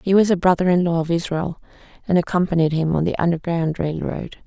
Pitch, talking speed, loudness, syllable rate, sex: 170 Hz, 215 wpm, -20 LUFS, 5.9 syllables/s, female